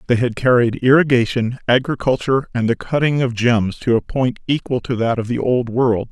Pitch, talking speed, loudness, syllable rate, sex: 125 Hz, 195 wpm, -17 LUFS, 5.3 syllables/s, male